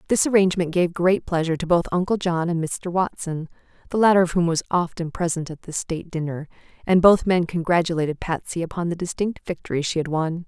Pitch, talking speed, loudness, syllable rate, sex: 170 Hz, 200 wpm, -22 LUFS, 5.9 syllables/s, female